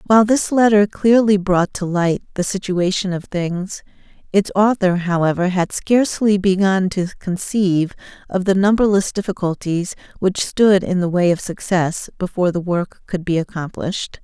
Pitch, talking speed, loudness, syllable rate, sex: 190 Hz, 150 wpm, -18 LUFS, 4.8 syllables/s, female